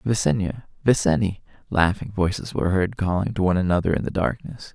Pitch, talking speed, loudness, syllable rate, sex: 95 Hz, 165 wpm, -23 LUFS, 6.0 syllables/s, male